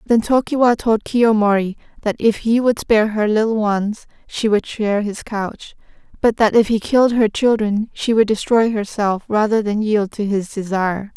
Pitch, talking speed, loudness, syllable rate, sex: 215 Hz, 185 wpm, -17 LUFS, 4.8 syllables/s, female